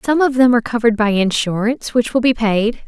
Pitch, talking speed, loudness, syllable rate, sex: 230 Hz, 230 wpm, -16 LUFS, 6.2 syllables/s, female